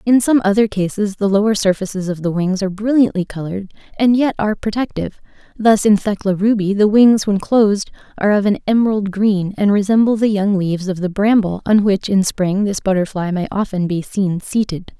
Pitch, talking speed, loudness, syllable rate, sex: 200 Hz, 195 wpm, -16 LUFS, 5.6 syllables/s, female